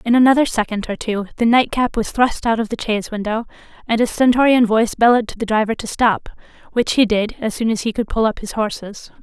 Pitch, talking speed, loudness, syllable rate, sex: 225 Hz, 235 wpm, -18 LUFS, 6.2 syllables/s, female